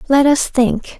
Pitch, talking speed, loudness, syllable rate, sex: 270 Hz, 180 wpm, -15 LUFS, 3.8 syllables/s, female